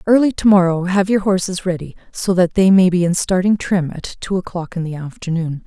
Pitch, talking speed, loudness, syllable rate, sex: 185 Hz, 225 wpm, -17 LUFS, 5.4 syllables/s, female